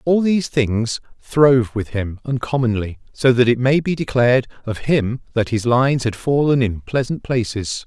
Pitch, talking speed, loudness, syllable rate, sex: 125 Hz, 175 wpm, -18 LUFS, 4.8 syllables/s, male